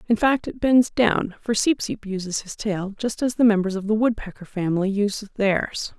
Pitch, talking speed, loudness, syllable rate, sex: 210 Hz, 210 wpm, -22 LUFS, 4.9 syllables/s, female